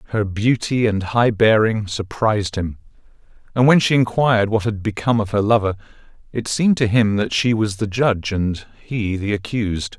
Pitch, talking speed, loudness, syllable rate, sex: 110 Hz, 180 wpm, -19 LUFS, 5.2 syllables/s, male